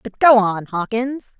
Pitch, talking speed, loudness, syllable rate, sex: 220 Hz, 170 wpm, -17 LUFS, 4.3 syllables/s, female